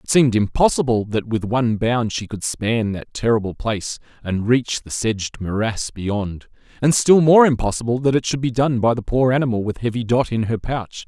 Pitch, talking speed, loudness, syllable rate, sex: 115 Hz, 205 wpm, -19 LUFS, 5.2 syllables/s, male